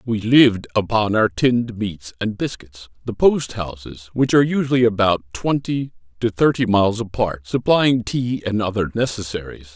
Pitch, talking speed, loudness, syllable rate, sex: 110 Hz, 140 wpm, -19 LUFS, 4.9 syllables/s, male